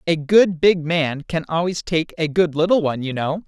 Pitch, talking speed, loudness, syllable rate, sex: 165 Hz, 225 wpm, -19 LUFS, 4.9 syllables/s, female